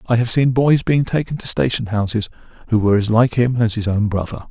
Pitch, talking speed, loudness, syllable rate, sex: 115 Hz, 240 wpm, -18 LUFS, 5.9 syllables/s, male